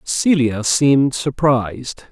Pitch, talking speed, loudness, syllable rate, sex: 135 Hz, 85 wpm, -16 LUFS, 3.5 syllables/s, male